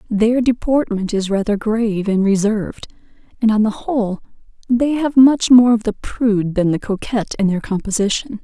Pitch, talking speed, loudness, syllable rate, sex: 220 Hz, 170 wpm, -17 LUFS, 5.2 syllables/s, female